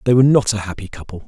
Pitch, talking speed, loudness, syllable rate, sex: 110 Hz, 280 wpm, -15 LUFS, 8.0 syllables/s, male